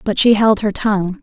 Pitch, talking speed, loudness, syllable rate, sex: 210 Hz, 245 wpm, -15 LUFS, 5.3 syllables/s, female